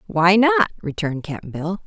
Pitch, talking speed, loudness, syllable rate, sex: 185 Hz, 160 wpm, -19 LUFS, 4.6 syllables/s, female